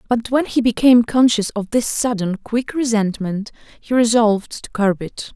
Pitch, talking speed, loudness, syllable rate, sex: 225 Hz, 170 wpm, -18 LUFS, 4.7 syllables/s, female